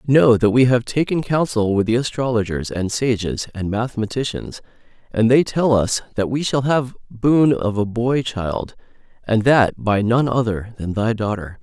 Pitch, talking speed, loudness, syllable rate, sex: 115 Hz, 175 wpm, -19 LUFS, 4.5 syllables/s, male